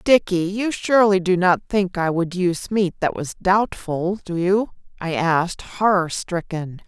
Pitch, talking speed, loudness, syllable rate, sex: 185 Hz, 165 wpm, -20 LUFS, 4.3 syllables/s, female